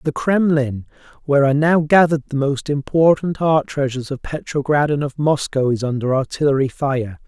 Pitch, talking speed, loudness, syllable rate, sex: 145 Hz, 165 wpm, -18 LUFS, 5.4 syllables/s, male